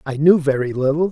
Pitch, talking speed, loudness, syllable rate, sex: 150 Hz, 215 wpm, -17 LUFS, 6.1 syllables/s, male